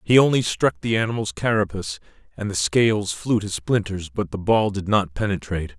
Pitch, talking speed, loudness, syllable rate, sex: 100 Hz, 185 wpm, -22 LUFS, 5.5 syllables/s, male